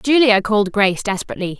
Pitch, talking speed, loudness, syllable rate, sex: 210 Hz, 150 wpm, -16 LUFS, 7.1 syllables/s, female